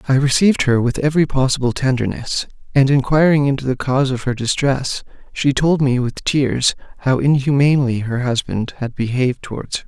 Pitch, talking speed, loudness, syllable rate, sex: 130 Hz, 170 wpm, -17 LUFS, 5.4 syllables/s, male